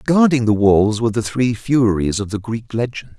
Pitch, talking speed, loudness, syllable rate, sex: 115 Hz, 205 wpm, -17 LUFS, 4.9 syllables/s, male